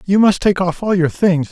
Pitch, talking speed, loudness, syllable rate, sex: 185 Hz, 275 wpm, -15 LUFS, 5.1 syllables/s, male